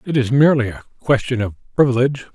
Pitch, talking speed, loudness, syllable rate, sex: 125 Hz, 180 wpm, -17 LUFS, 7.1 syllables/s, male